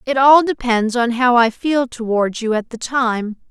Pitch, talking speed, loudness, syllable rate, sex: 240 Hz, 205 wpm, -16 LUFS, 4.2 syllables/s, female